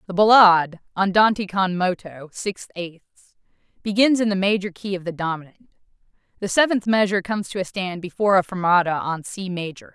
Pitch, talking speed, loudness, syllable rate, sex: 190 Hz, 165 wpm, -20 LUFS, 5.7 syllables/s, female